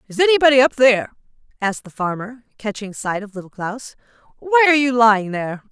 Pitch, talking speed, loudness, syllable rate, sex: 230 Hz, 180 wpm, -17 LUFS, 6.3 syllables/s, female